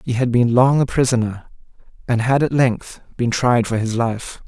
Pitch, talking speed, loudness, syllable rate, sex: 120 Hz, 200 wpm, -18 LUFS, 4.6 syllables/s, male